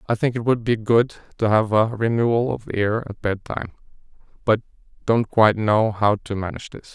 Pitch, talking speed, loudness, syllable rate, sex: 110 Hz, 200 wpm, -21 LUFS, 5.1 syllables/s, male